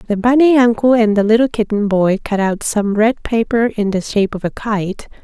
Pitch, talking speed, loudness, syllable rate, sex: 215 Hz, 220 wpm, -15 LUFS, 5.1 syllables/s, female